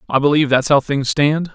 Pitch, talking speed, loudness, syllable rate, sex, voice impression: 145 Hz, 235 wpm, -16 LUFS, 6.0 syllables/s, male, masculine, middle-aged, thick, powerful, hard, slightly halting, mature, wild, lively, strict